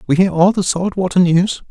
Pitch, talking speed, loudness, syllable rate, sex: 180 Hz, 245 wpm, -15 LUFS, 5.3 syllables/s, male